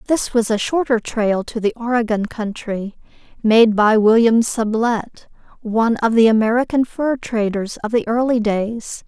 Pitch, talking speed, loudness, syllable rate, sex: 225 Hz, 150 wpm, -17 LUFS, 4.5 syllables/s, female